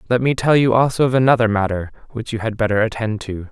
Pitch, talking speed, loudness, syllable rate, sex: 115 Hz, 240 wpm, -18 LUFS, 6.5 syllables/s, male